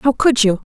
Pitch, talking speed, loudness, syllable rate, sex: 240 Hz, 255 wpm, -15 LUFS, 4.9 syllables/s, female